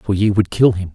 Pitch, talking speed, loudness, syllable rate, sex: 100 Hz, 315 wpm, -16 LUFS, 5.5 syllables/s, male